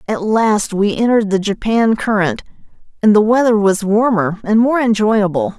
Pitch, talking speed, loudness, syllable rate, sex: 210 Hz, 160 wpm, -14 LUFS, 4.8 syllables/s, female